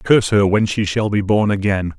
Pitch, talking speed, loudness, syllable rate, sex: 100 Hz, 240 wpm, -17 LUFS, 5.2 syllables/s, male